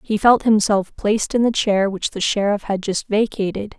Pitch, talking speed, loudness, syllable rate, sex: 210 Hz, 205 wpm, -19 LUFS, 4.9 syllables/s, female